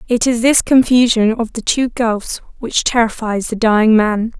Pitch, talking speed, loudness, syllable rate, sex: 230 Hz, 180 wpm, -14 LUFS, 4.5 syllables/s, female